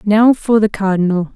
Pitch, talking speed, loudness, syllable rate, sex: 205 Hz, 180 wpm, -14 LUFS, 4.8 syllables/s, female